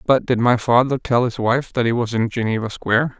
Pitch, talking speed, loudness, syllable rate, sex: 120 Hz, 245 wpm, -19 LUFS, 5.5 syllables/s, male